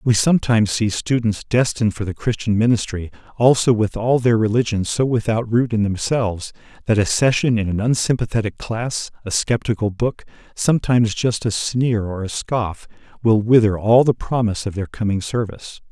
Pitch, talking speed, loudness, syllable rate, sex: 110 Hz, 170 wpm, -19 LUFS, 5.3 syllables/s, male